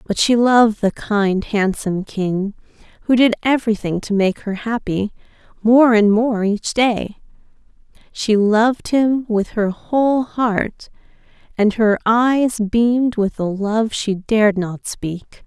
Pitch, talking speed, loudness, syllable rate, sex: 220 Hz, 145 wpm, -17 LUFS, 3.8 syllables/s, female